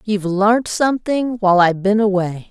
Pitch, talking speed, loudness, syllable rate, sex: 205 Hz, 165 wpm, -16 LUFS, 5.5 syllables/s, female